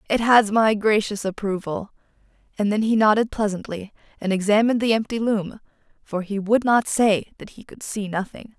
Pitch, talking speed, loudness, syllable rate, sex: 210 Hz, 175 wpm, -21 LUFS, 5.1 syllables/s, female